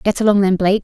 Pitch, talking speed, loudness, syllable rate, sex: 200 Hz, 290 wpm, -15 LUFS, 8.2 syllables/s, female